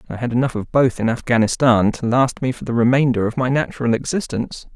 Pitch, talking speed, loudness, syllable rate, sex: 120 Hz, 215 wpm, -18 LUFS, 6.2 syllables/s, male